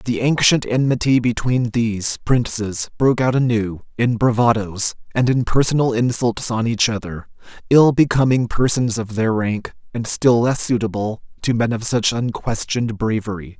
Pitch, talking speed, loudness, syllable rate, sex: 115 Hz, 150 wpm, -18 LUFS, 4.7 syllables/s, male